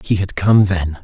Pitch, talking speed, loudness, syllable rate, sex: 95 Hz, 230 wpm, -15 LUFS, 4.4 syllables/s, male